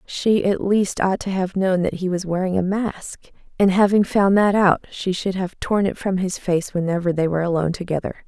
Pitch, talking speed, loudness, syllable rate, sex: 185 Hz, 225 wpm, -20 LUFS, 5.2 syllables/s, female